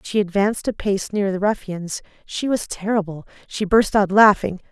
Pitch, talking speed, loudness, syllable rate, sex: 200 Hz, 180 wpm, -20 LUFS, 5.2 syllables/s, female